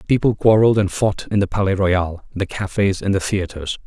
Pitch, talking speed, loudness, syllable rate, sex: 100 Hz, 200 wpm, -19 LUFS, 5.5 syllables/s, male